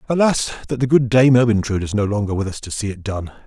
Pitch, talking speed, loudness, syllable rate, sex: 110 Hz, 260 wpm, -18 LUFS, 6.7 syllables/s, male